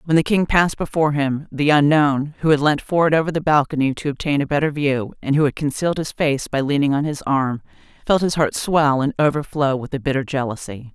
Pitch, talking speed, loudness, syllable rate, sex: 145 Hz, 225 wpm, -19 LUFS, 5.8 syllables/s, female